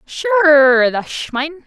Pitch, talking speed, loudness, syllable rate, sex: 300 Hz, 110 wpm, -14 LUFS, 3.8 syllables/s, female